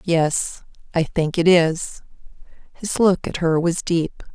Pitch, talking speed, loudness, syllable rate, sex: 170 Hz, 150 wpm, -20 LUFS, 3.5 syllables/s, female